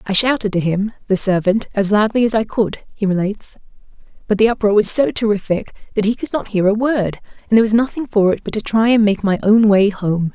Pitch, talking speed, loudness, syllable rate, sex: 210 Hz, 240 wpm, -16 LUFS, 5.9 syllables/s, female